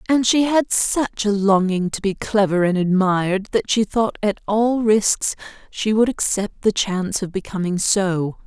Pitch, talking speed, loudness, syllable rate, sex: 205 Hz, 175 wpm, -19 LUFS, 4.3 syllables/s, female